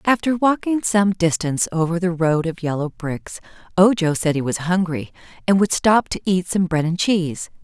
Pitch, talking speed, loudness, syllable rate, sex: 180 Hz, 190 wpm, -20 LUFS, 5.0 syllables/s, female